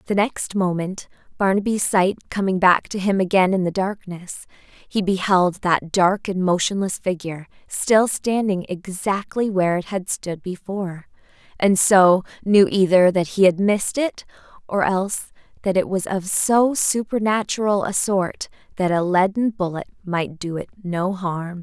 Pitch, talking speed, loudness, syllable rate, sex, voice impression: 190 Hz, 155 wpm, -20 LUFS, 4.4 syllables/s, female, very feminine, slightly young, slightly adult-like, thin, tensed, powerful, slightly dark, slightly hard, slightly muffled, fluent, slightly raspy, cute, slightly cool, slightly intellectual, very refreshing, slightly sincere, slightly calm, reassuring, very unique, slightly elegant, wild, sweet, kind, slightly intense, slightly sharp, light